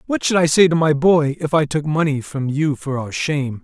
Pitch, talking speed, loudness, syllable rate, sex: 150 Hz, 265 wpm, -18 LUFS, 5.2 syllables/s, male